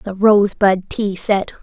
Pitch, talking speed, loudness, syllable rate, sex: 200 Hz, 150 wpm, -16 LUFS, 4.0 syllables/s, female